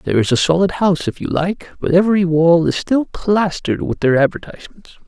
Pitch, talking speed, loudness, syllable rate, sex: 175 Hz, 200 wpm, -16 LUFS, 5.9 syllables/s, male